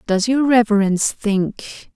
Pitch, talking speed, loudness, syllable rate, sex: 220 Hz, 125 wpm, -17 LUFS, 4.6 syllables/s, female